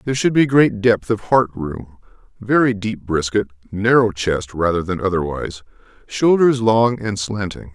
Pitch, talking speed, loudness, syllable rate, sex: 105 Hz, 155 wpm, -18 LUFS, 4.6 syllables/s, male